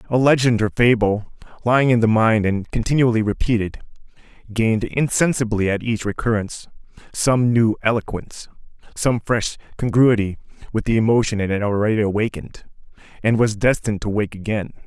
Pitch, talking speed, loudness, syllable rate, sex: 110 Hz, 140 wpm, -19 LUFS, 5.8 syllables/s, male